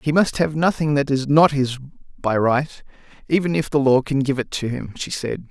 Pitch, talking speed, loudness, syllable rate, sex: 140 Hz, 230 wpm, -20 LUFS, 5.1 syllables/s, male